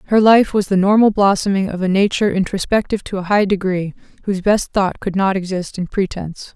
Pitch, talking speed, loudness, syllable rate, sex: 195 Hz, 200 wpm, -17 LUFS, 6.0 syllables/s, female